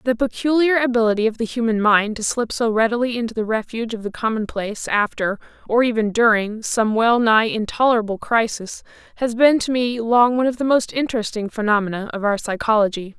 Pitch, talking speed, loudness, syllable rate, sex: 225 Hz, 180 wpm, -19 LUFS, 5.8 syllables/s, female